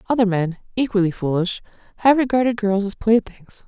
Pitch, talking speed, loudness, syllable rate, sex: 210 Hz, 145 wpm, -20 LUFS, 5.6 syllables/s, female